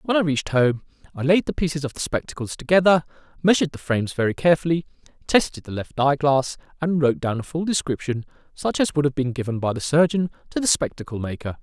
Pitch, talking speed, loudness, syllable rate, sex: 145 Hz, 210 wpm, -22 LUFS, 6.4 syllables/s, male